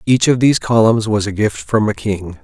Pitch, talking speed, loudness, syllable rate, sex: 110 Hz, 245 wpm, -15 LUFS, 5.2 syllables/s, male